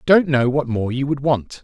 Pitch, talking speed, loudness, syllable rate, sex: 135 Hz, 295 wpm, -19 LUFS, 5.6 syllables/s, male